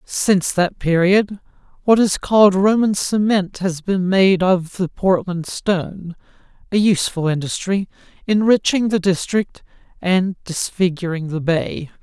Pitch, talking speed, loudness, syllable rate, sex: 185 Hz, 120 wpm, -18 LUFS, 4.2 syllables/s, male